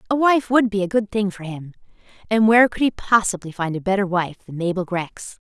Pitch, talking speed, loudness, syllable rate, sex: 200 Hz, 230 wpm, -20 LUFS, 5.8 syllables/s, female